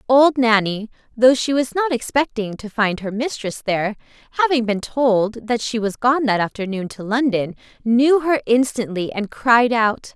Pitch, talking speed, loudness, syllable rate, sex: 235 Hz, 170 wpm, -19 LUFS, 4.5 syllables/s, female